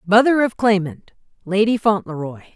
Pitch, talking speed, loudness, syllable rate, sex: 200 Hz, 120 wpm, -18 LUFS, 4.0 syllables/s, female